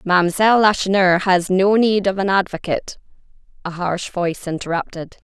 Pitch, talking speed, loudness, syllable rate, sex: 185 Hz, 135 wpm, -18 LUFS, 5.6 syllables/s, female